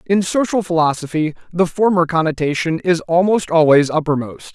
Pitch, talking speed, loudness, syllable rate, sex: 170 Hz, 130 wpm, -16 LUFS, 5.2 syllables/s, male